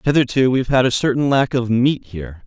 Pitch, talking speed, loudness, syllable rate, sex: 125 Hz, 220 wpm, -17 LUFS, 6.0 syllables/s, male